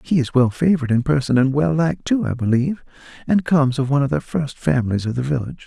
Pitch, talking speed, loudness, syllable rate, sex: 140 Hz, 245 wpm, -19 LUFS, 6.8 syllables/s, male